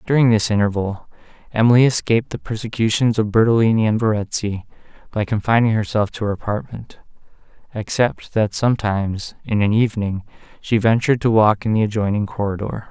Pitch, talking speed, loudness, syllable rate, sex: 110 Hz, 145 wpm, -19 LUFS, 5.9 syllables/s, male